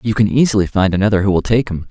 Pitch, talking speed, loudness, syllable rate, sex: 100 Hz, 285 wpm, -15 LUFS, 7.2 syllables/s, male